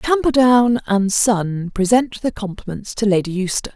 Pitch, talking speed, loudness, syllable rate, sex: 215 Hz, 145 wpm, -17 LUFS, 4.7 syllables/s, female